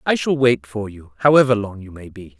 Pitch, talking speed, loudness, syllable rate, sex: 110 Hz, 250 wpm, -18 LUFS, 5.5 syllables/s, male